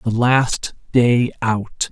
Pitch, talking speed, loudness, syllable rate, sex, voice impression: 120 Hz, 125 wpm, -18 LUFS, 2.6 syllables/s, male, masculine, adult-like, sincere, calm, kind